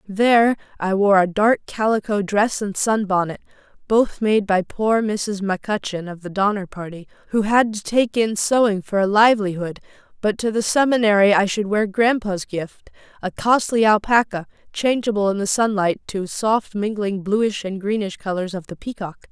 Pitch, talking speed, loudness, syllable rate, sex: 205 Hz, 170 wpm, -20 LUFS, 4.8 syllables/s, female